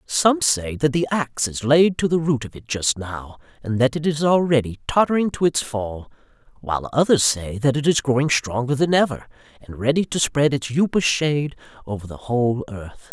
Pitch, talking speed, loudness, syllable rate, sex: 135 Hz, 200 wpm, -20 LUFS, 5.2 syllables/s, male